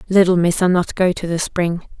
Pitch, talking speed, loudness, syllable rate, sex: 175 Hz, 210 wpm, -17 LUFS, 5.2 syllables/s, female